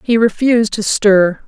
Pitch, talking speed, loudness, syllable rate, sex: 215 Hz, 165 wpm, -13 LUFS, 4.6 syllables/s, female